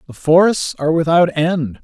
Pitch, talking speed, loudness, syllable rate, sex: 160 Hz, 165 wpm, -15 LUFS, 5.0 syllables/s, male